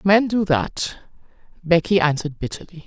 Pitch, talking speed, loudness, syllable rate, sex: 180 Hz, 125 wpm, -20 LUFS, 5.1 syllables/s, female